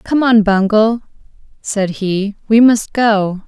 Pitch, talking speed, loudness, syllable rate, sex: 215 Hz, 140 wpm, -13 LUFS, 3.4 syllables/s, female